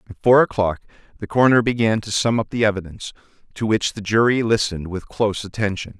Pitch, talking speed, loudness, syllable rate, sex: 110 Hz, 190 wpm, -19 LUFS, 6.5 syllables/s, male